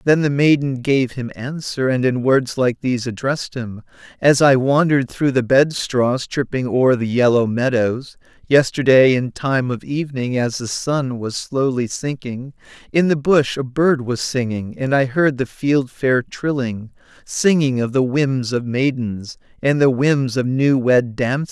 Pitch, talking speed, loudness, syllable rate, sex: 130 Hz, 170 wpm, -18 LUFS, 4.4 syllables/s, male